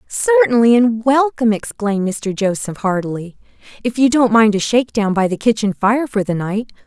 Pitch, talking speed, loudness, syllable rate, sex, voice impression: 215 Hz, 175 wpm, -16 LUFS, 5.2 syllables/s, female, very feminine, slightly adult-like, thin, tensed, powerful, bright, soft, very clear, fluent, slightly raspy, slightly cute, cool, intellectual, very refreshing, sincere, calm, very friendly, very reassuring, very unique, elegant, wild, sweet, very lively, kind, slightly intense, light